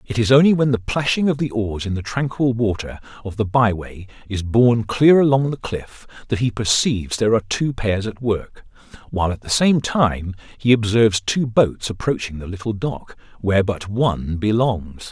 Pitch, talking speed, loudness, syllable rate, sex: 110 Hz, 195 wpm, -19 LUFS, 5.1 syllables/s, male